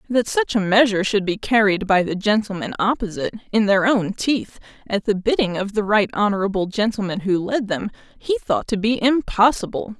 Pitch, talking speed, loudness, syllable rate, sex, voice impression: 210 Hz, 185 wpm, -20 LUFS, 5.4 syllables/s, female, feminine, adult-like, tensed, powerful, clear, fluent, slightly raspy, friendly, lively, intense